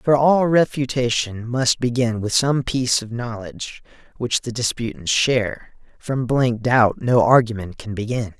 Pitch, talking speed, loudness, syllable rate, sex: 120 Hz, 150 wpm, -20 LUFS, 4.4 syllables/s, male